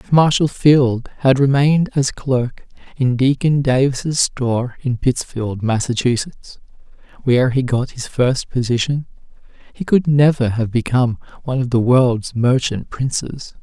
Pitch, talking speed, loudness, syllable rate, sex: 130 Hz, 135 wpm, -17 LUFS, 4.4 syllables/s, male